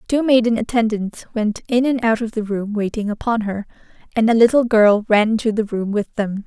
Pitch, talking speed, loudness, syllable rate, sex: 220 Hz, 215 wpm, -18 LUFS, 5.3 syllables/s, female